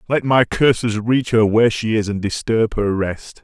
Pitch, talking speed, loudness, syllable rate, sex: 110 Hz, 210 wpm, -17 LUFS, 4.6 syllables/s, male